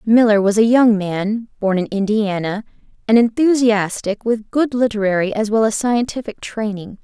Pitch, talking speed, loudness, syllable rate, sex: 215 Hz, 155 wpm, -17 LUFS, 4.7 syllables/s, female